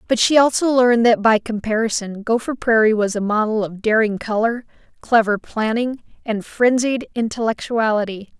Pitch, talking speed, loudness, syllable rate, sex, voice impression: 225 Hz, 145 wpm, -18 LUFS, 5.1 syllables/s, female, feminine, very adult-like, fluent, intellectual, slightly sharp